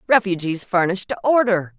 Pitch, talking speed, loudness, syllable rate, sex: 195 Hz, 135 wpm, -19 LUFS, 5.8 syllables/s, female